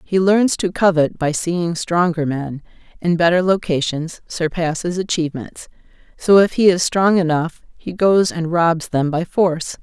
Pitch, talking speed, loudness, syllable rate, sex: 170 Hz, 165 wpm, -17 LUFS, 4.4 syllables/s, female